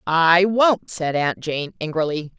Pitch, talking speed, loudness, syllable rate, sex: 170 Hz, 150 wpm, -19 LUFS, 3.7 syllables/s, female